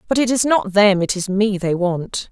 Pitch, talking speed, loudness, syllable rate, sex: 200 Hz, 235 wpm, -17 LUFS, 4.7 syllables/s, female